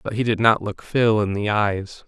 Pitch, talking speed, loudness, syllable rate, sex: 105 Hz, 260 wpm, -20 LUFS, 4.6 syllables/s, male